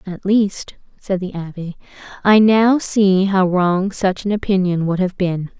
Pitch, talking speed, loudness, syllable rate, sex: 190 Hz, 170 wpm, -17 LUFS, 4.0 syllables/s, female